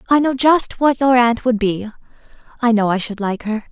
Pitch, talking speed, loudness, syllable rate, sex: 235 Hz, 225 wpm, -16 LUFS, 5.2 syllables/s, female